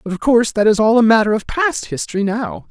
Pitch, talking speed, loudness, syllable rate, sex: 210 Hz, 265 wpm, -15 LUFS, 6.1 syllables/s, male